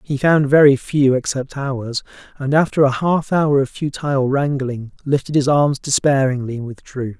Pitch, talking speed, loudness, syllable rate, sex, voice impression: 135 Hz, 165 wpm, -18 LUFS, 4.7 syllables/s, male, masculine, middle-aged, powerful, raspy, slightly mature, friendly, unique, wild, lively, intense